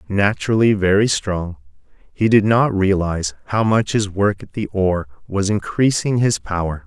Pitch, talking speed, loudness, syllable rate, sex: 100 Hz, 155 wpm, -18 LUFS, 4.6 syllables/s, male